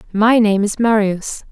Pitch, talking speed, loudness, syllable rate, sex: 210 Hz, 160 wpm, -15 LUFS, 4.1 syllables/s, female